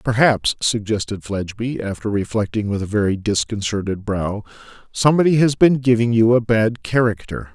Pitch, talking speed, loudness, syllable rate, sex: 110 Hz, 145 wpm, -19 LUFS, 5.2 syllables/s, male